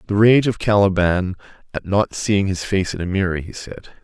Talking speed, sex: 210 wpm, male